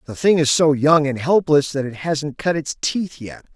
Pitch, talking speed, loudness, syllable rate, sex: 150 Hz, 235 wpm, -18 LUFS, 4.6 syllables/s, male